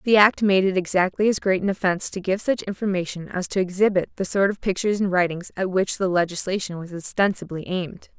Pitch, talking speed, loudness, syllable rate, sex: 190 Hz, 215 wpm, -22 LUFS, 6.2 syllables/s, female